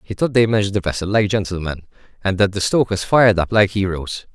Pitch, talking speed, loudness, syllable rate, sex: 100 Hz, 220 wpm, -18 LUFS, 6.2 syllables/s, male